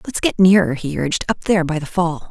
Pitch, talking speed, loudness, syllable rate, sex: 180 Hz, 260 wpm, -17 LUFS, 6.0 syllables/s, female